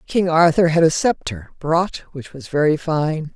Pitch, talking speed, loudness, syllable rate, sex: 160 Hz, 180 wpm, -18 LUFS, 4.3 syllables/s, female